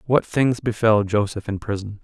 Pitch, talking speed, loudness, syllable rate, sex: 110 Hz, 175 wpm, -21 LUFS, 4.8 syllables/s, male